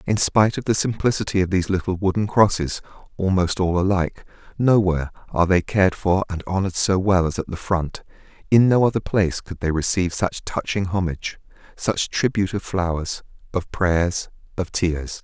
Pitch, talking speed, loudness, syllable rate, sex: 95 Hz, 175 wpm, -21 LUFS, 5.6 syllables/s, male